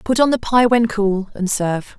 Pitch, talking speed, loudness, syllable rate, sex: 215 Hz, 240 wpm, -17 LUFS, 4.8 syllables/s, female